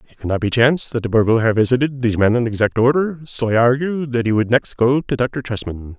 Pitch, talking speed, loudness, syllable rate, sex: 120 Hz, 260 wpm, -17 LUFS, 6.1 syllables/s, male